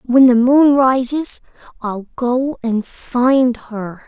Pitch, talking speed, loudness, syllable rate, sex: 250 Hz, 130 wpm, -15 LUFS, 2.8 syllables/s, female